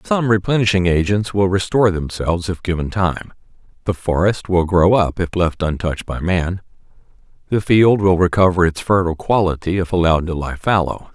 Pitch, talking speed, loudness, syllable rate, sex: 90 Hz, 165 wpm, -17 LUFS, 5.4 syllables/s, male